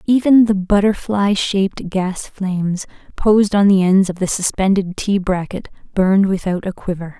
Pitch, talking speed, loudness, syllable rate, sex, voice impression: 195 Hz, 160 wpm, -16 LUFS, 4.7 syllables/s, female, very feminine, slightly young, thin, slightly tensed, slightly weak, dark, soft, slightly muffled, fluent, slightly raspy, very cute, very intellectual, refreshing, sincere, calm, very friendly, very reassuring, unique, very elegant, slightly wild, very sweet, lively, very kind, modest, slightly light